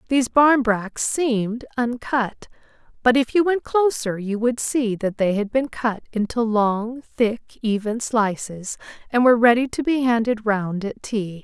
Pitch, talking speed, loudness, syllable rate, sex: 230 Hz, 165 wpm, -21 LUFS, 4.2 syllables/s, female